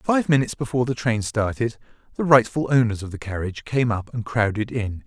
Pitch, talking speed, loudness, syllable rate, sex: 115 Hz, 200 wpm, -22 LUFS, 5.8 syllables/s, male